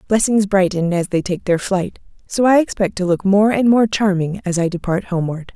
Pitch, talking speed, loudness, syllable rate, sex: 195 Hz, 215 wpm, -17 LUFS, 5.3 syllables/s, female